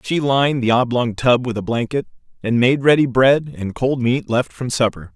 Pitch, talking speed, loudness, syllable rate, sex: 125 Hz, 210 wpm, -18 LUFS, 4.9 syllables/s, male